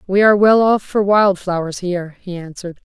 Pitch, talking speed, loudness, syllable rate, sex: 190 Hz, 205 wpm, -15 LUFS, 5.6 syllables/s, female